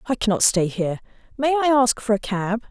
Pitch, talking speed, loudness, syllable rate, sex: 230 Hz, 220 wpm, -20 LUFS, 5.6 syllables/s, female